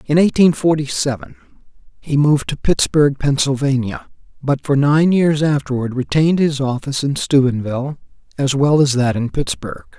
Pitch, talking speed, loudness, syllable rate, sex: 140 Hz, 150 wpm, -17 LUFS, 5.1 syllables/s, male